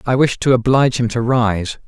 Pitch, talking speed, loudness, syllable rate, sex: 120 Hz, 225 wpm, -16 LUFS, 5.3 syllables/s, male